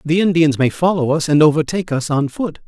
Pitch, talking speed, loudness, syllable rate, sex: 160 Hz, 225 wpm, -16 LUFS, 5.9 syllables/s, male